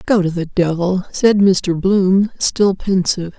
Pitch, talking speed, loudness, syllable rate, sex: 185 Hz, 160 wpm, -16 LUFS, 3.9 syllables/s, female